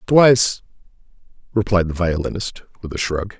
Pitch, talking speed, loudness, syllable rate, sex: 95 Hz, 125 wpm, -19 LUFS, 5.1 syllables/s, male